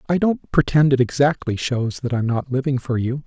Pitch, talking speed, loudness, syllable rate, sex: 135 Hz, 220 wpm, -20 LUFS, 5.2 syllables/s, male